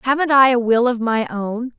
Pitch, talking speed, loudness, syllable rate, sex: 245 Hz, 235 wpm, -17 LUFS, 4.8 syllables/s, female